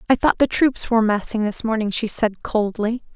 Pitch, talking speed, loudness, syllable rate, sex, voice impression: 220 Hz, 210 wpm, -20 LUFS, 5.2 syllables/s, female, feminine, slightly adult-like, cute, slightly refreshing, sincere, slightly friendly